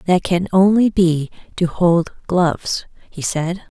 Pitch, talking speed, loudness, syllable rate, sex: 175 Hz, 145 wpm, -17 LUFS, 3.6 syllables/s, female